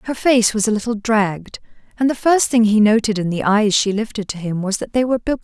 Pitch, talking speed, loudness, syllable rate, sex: 220 Hz, 265 wpm, -17 LUFS, 6.5 syllables/s, female